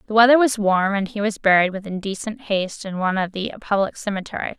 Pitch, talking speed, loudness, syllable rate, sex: 205 Hz, 220 wpm, -20 LUFS, 6.2 syllables/s, female